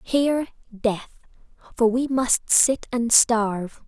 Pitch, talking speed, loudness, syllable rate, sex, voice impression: 235 Hz, 125 wpm, -21 LUFS, 3.5 syllables/s, female, very feminine, very young, tensed, very powerful, bright, very soft, very clear, very fluent, slightly raspy, very cute, intellectual, very refreshing, sincere, slightly calm, friendly, reassuring, very unique, slightly elegant, wild, slightly sweet, very lively, strict, intense, sharp, very light